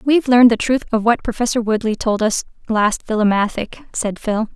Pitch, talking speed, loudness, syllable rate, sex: 225 Hz, 185 wpm, -17 LUFS, 5.5 syllables/s, female